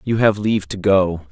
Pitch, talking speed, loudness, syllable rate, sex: 100 Hz, 230 wpm, -17 LUFS, 5.0 syllables/s, male